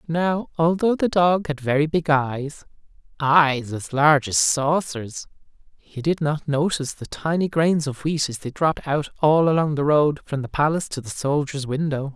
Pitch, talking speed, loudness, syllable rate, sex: 150 Hz, 185 wpm, -21 LUFS, 4.6 syllables/s, male